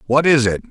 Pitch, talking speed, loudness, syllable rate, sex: 130 Hz, 255 wpm, -15 LUFS, 6.0 syllables/s, male